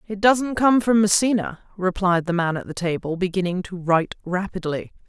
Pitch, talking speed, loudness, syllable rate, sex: 190 Hz, 175 wpm, -21 LUFS, 5.2 syllables/s, female